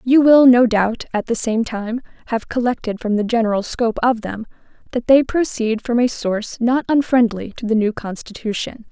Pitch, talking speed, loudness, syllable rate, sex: 235 Hz, 190 wpm, -18 LUFS, 5.1 syllables/s, female